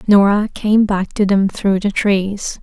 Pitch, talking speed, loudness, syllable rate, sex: 200 Hz, 185 wpm, -15 LUFS, 3.7 syllables/s, female